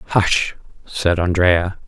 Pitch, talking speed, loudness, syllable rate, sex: 90 Hz, 95 wpm, -18 LUFS, 2.7 syllables/s, male